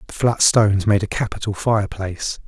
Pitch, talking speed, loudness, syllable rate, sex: 105 Hz, 170 wpm, -19 LUFS, 5.8 syllables/s, male